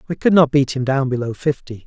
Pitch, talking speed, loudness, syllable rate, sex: 135 Hz, 260 wpm, -17 LUFS, 5.9 syllables/s, male